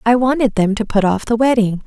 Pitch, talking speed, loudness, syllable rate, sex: 225 Hz, 255 wpm, -15 LUFS, 5.7 syllables/s, female